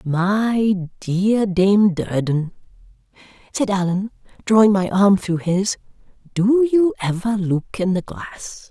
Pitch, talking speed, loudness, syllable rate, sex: 200 Hz, 125 wpm, -19 LUFS, 3.5 syllables/s, female